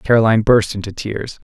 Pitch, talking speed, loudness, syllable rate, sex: 110 Hz, 160 wpm, -16 LUFS, 5.8 syllables/s, male